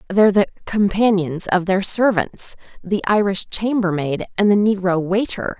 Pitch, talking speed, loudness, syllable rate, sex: 195 Hz, 130 wpm, -18 LUFS, 4.6 syllables/s, female